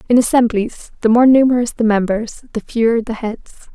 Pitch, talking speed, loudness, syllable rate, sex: 230 Hz, 175 wpm, -15 LUFS, 5.3 syllables/s, female